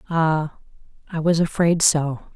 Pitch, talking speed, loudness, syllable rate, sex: 160 Hz, 125 wpm, -20 LUFS, 3.9 syllables/s, female